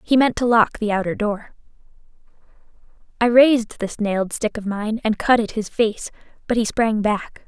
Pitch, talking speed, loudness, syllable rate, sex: 220 Hz, 185 wpm, -20 LUFS, 5.0 syllables/s, female